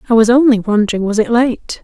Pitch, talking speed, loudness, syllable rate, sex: 230 Hz, 230 wpm, -13 LUFS, 6.1 syllables/s, female